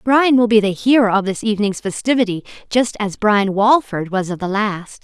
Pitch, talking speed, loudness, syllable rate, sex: 210 Hz, 205 wpm, -17 LUFS, 5.1 syllables/s, female